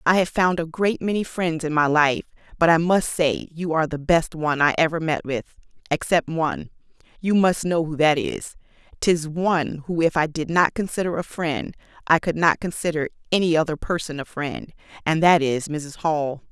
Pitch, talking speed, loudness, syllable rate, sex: 160 Hz, 200 wpm, -22 LUFS, 5.0 syllables/s, female